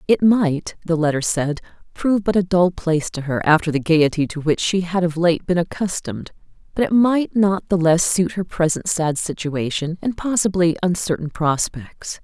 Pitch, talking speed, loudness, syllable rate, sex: 175 Hz, 185 wpm, -19 LUFS, 4.9 syllables/s, female